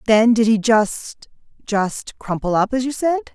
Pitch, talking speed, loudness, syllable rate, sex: 230 Hz, 145 wpm, -18 LUFS, 4.0 syllables/s, female